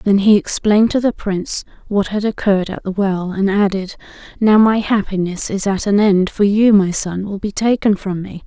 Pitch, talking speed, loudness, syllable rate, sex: 200 Hz, 215 wpm, -16 LUFS, 5.0 syllables/s, female